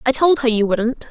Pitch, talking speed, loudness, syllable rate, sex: 245 Hz, 270 wpm, -17 LUFS, 5.1 syllables/s, female